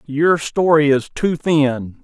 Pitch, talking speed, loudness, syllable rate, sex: 150 Hz, 150 wpm, -16 LUFS, 3.3 syllables/s, male